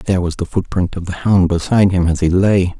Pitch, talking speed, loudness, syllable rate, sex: 90 Hz, 260 wpm, -16 LUFS, 5.8 syllables/s, male